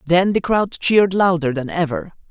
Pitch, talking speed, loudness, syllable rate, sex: 170 Hz, 180 wpm, -18 LUFS, 4.9 syllables/s, male